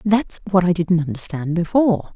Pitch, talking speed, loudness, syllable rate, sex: 180 Hz, 165 wpm, -19 LUFS, 5.2 syllables/s, female